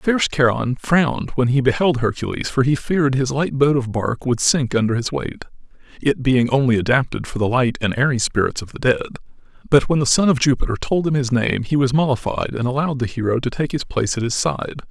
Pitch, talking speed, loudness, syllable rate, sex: 130 Hz, 230 wpm, -19 LUFS, 5.8 syllables/s, male